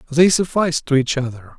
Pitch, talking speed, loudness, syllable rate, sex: 145 Hz, 190 wpm, -18 LUFS, 6.0 syllables/s, male